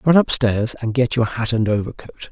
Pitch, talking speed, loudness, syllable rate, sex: 120 Hz, 210 wpm, -19 LUFS, 5.6 syllables/s, male